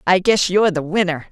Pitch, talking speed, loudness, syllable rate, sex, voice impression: 180 Hz, 230 wpm, -17 LUFS, 6.0 syllables/s, female, feminine, middle-aged, tensed, powerful, bright, clear, intellectual, friendly, elegant, lively, slightly strict